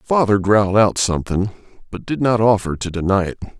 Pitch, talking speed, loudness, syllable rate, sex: 105 Hz, 185 wpm, -18 LUFS, 5.8 syllables/s, male